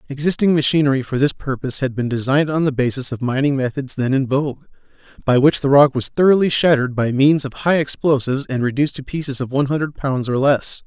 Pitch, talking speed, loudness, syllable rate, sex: 135 Hz, 215 wpm, -18 LUFS, 6.3 syllables/s, male